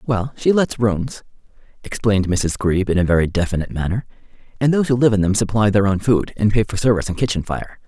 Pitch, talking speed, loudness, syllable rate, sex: 105 Hz, 220 wpm, -19 LUFS, 6.2 syllables/s, male